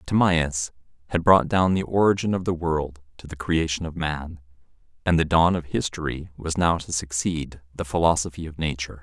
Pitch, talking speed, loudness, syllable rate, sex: 80 Hz, 180 wpm, -23 LUFS, 5.2 syllables/s, male